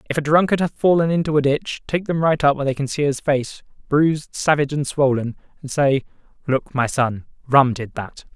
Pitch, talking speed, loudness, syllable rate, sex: 140 Hz, 215 wpm, -19 LUFS, 5.5 syllables/s, male